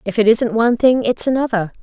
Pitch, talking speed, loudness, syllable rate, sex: 230 Hz, 230 wpm, -16 LUFS, 6.1 syllables/s, female